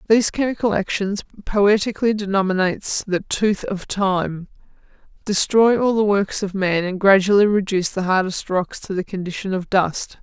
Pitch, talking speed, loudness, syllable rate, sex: 195 Hz, 155 wpm, -19 LUFS, 5.0 syllables/s, female